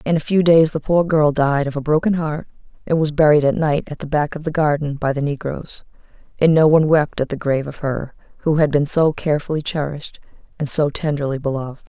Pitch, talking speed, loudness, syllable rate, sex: 150 Hz, 225 wpm, -18 LUFS, 5.9 syllables/s, female